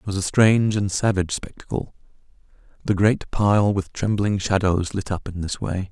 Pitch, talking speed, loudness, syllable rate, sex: 100 Hz, 185 wpm, -22 LUFS, 5.1 syllables/s, male